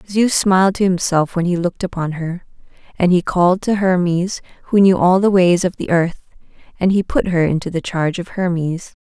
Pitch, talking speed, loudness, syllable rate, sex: 180 Hz, 205 wpm, -17 LUFS, 5.4 syllables/s, female